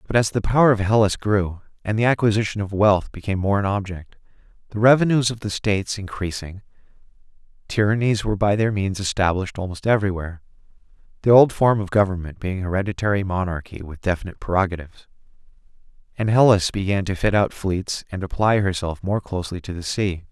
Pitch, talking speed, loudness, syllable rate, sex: 100 Hz, 160 wpm, -21 LUFS, 6.2 syllables/s, male